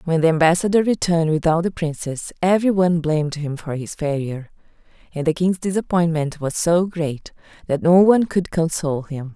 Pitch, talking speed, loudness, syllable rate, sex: 165 Hz, 175 wpm, -19 LUFS, 5.6 syllables/s, female